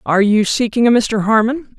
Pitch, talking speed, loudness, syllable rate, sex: 225 Hz, 200 wpm, -14 LUFS, 5.3 syllables/s, female